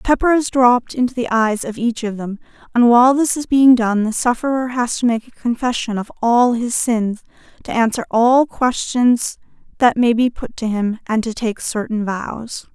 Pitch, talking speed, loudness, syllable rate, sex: 240 Hz, 200 wpm, -17 LUFS, 4.7 syllables/s, female